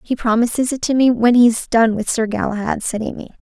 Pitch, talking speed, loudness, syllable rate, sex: 230 Hz, 240 wpm, -17 LUFS, 5.9 syllables/s, female